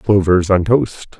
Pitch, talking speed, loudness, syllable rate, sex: 95 Hz, 150 wpm, -14 LUFS, 3.7 syllables/s, male